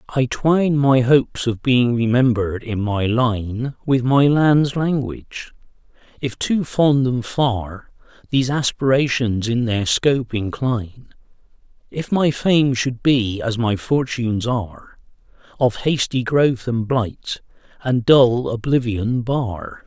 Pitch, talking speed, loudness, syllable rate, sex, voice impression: 125 Hz, 130 wpm, -19 LUFS, 3.8 syllables/s, male, masculine, middle-aged, slightly thick, sincere, calm, mature